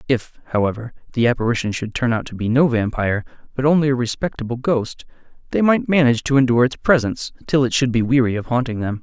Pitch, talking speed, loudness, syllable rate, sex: 125 Hz, 205 wpm, -19 LUFS, 6.6 syllables/s, male